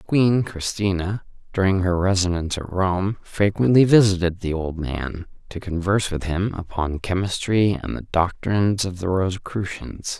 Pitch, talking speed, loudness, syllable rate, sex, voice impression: 95 Hz, 140 wpm, -22 LUFS, 4.6 syllables/s, male, masculine, adult-like, slightly cool, slightly intellectual, slightly kind